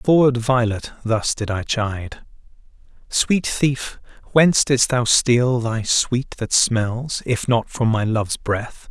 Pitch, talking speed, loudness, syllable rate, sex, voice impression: 120 Hz, 155 wpm, -19 LUFS, 3.7 syllables/s, male, very masculine, very middle-aged, thick, tensed, powerful, slightly dark, soft, muffled, fluent, raspy, cool, very intellectual, slightly refreshing, sincere, very calm, mature, very friendly, very reassuring, unique, elegant, wild, very sweet, lively, kind, modest